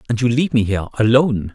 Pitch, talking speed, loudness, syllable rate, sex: 120 Hz, 235 wpm, -17 LUFS, 7.6 syllables/s, male